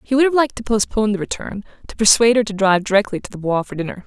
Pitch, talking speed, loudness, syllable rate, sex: 215 Hz, 280 wpm, -17 LUFS, 7.8 syllables/s, female